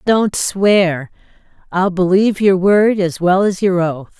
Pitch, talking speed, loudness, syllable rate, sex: 185 Hz, 155 wpm, -14 LUFS, 3.8 syllables/s, female